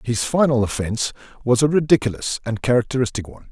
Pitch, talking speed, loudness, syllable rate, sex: 125 Hz, 155 wpm, -20 LUFS, 6.7 syllables/s, male